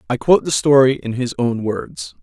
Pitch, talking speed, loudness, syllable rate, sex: 125 Hz, 215 wpm, -17 LUFS, 5.2 syllables/s, male